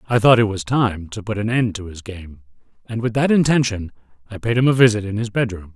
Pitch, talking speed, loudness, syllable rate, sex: 110 Hz, 250 wpm, -18 LUFS, 5.7 syllables/s, male